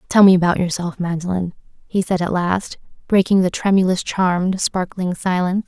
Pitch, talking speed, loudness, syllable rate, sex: 185 Hz, 160 wpm, -18 LUFS, 5.3 syllables/s, female